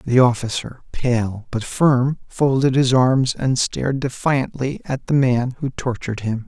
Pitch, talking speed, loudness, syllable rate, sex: 125 Hz, 155 wpm, -19 LUFS, 4.1 syllables/s, male